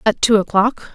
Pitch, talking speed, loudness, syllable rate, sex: 210 Hz, 190 wpm, -16 LUFS, 4.7 syllables/s, female